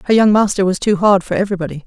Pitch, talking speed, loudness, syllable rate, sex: 195 Hz, 290 wpm, -15 LUFS, 7.7 syllables/s, female